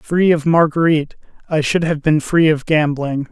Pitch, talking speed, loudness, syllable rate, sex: 155 Hz, 180 wpm, -16 LUFS, 4.7 syllables/s, male